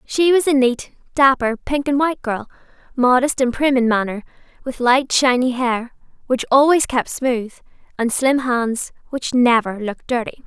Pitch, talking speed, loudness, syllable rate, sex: 255 Hz, 165 wpm, -18 LUFS, 4.5 syllables/s, female